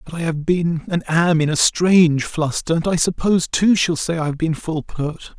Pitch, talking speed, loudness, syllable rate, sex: 165 Hz, 235 wpm, -18 LUFS, 4.8 syllables/s, male